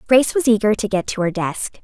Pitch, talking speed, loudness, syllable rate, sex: 215 Hz, 260 wpm, -18 LUFS, 6.1 syllables/s, female